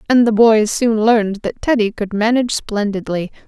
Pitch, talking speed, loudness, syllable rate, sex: 220 Hz, 175 wpm, -16 LUFS, 5.1 syllables/s, female